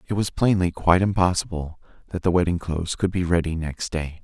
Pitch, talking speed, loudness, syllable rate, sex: 85 Hz, 200 wpm, -23 LUFS, 5.9 syllables/s, male